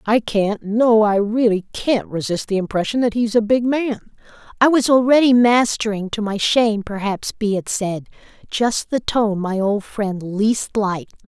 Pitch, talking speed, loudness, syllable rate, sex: 215 Hz, 165 wpm, -18 LUFS, 4.4 syllables/s, female